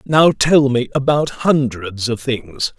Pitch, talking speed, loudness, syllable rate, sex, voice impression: 135 Hz, 150 wpm, -16 LUFS, 3.5 syllables/s, male, very masculine, middle-aged, very thick, very tensed, very powerful, bright, slightly soft, very clear, fluent, very cool, intellectual, refreshing, sincere, calm, very mature, very friendly, very reassuring, very unique, elegant, wild, slightly sweet, very lively, kind, intense